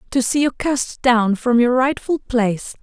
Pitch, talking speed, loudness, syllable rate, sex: 250 Hz, 190 wpm, -18 LUFS, 4.3 syllables/s, female